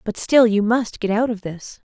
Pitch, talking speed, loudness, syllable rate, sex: 220 Hz, 250 wpm, -19 LUFS, 4.6 syllables/s, female